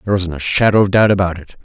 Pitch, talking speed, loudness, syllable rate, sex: 95 Hz, 295 wpm, -14 LUFS, 7.4 syllables/s, male